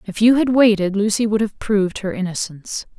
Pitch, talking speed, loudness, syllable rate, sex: 205 Hz, 200 wpm, -18 LUFS, 5.7 syllables/s, female